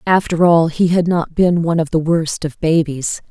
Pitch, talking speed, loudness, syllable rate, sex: 165 Hz, 220 wpm, -16 LUFS, 4.8 syllables/s, female